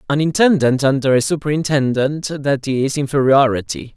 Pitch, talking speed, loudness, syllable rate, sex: 140 Hz, 105 wpm, -16 LUFS, 5.0 syllables/s, male